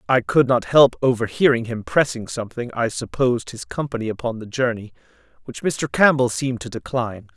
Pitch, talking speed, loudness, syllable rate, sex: 120 Hz, 165 wpm, -20 LUFS, 5.6 syllables/s, male